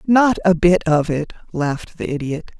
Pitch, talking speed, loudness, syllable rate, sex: 170 Hz, 185 wpm, -18 LUFS, 4.8 syllables/s, female